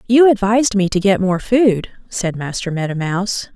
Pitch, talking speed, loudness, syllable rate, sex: 200 Hz, 185 wpm, -16 LUFS, 5.1 syllables/s, female